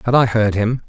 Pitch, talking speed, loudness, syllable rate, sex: 115 Hz, 275 wpm, -16 LUFS, 5.6 syllables/s, male